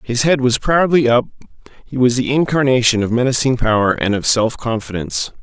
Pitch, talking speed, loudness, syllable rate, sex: 125 Hz, 175 wpm, -16 LUFS, 5.6 syllables/s, male